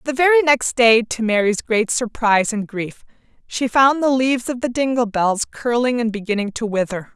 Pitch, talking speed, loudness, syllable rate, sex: 235 Hz, 195 wpm, -18 LUFS, 5.0 syllables/s, female